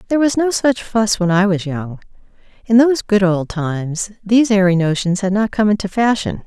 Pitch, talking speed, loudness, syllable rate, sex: 205 Hz, 205 wpm, -16 LUFS, 5.4 syllables/s, female